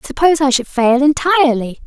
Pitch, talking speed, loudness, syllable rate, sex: 280 Hz, 160 wpm, -14 LUFS, 5.9 syllables/s, female